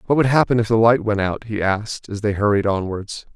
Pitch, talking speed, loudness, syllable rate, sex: 105 Hz, 250 wpm, -19 LUFS, 5.8 syllables/s, male